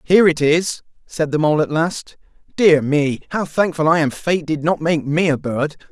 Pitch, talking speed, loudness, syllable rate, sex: 155 Hz, 215 wpm, -18 LUFS, 4.7 syllables/s, male